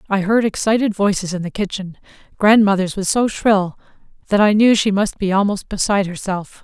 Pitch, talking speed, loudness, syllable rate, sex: 200 Hz, 170 wpm, -17 LUFS, 5.5 syllables/s, female